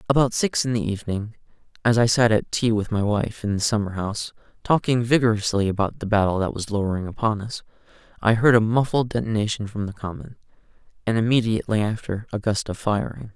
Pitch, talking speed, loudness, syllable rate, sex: 110 Hz, 185 wpm, -22 LUFS, 6.0 syllables/s, male